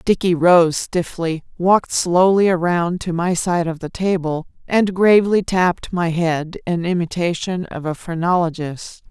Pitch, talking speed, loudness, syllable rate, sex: 175 Hz, 145 wpm, -18 LUFS, 4.3 syllables/s, female